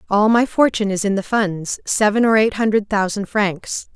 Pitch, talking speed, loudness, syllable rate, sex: 210 Hz, 195 wpm, -18 LUFS, 4.9 syllables/s, female